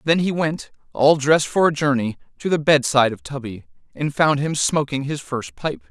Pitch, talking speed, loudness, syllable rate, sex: 145 Hz, 205 wpm, -20 LUFS, 5.2 syllables/s, male